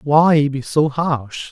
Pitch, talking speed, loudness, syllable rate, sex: 145 Hz, 160 wpm, -17 LUFS, 2.7 syllables/s, male